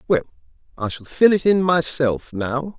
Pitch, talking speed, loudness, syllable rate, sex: 145 Hz, 170 wpm, -20 LUFS, 4.5 syllables/s, male